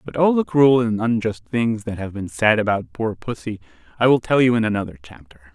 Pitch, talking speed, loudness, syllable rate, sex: 115 Hz, 225 wpm, -19 LUFS, 5.4 syllables/s, male